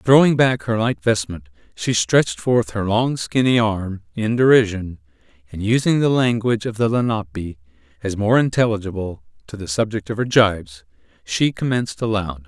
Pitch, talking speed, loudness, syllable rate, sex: 105 Hz, 160 wpm, -19 LUFS, 5.0 syllables/s, male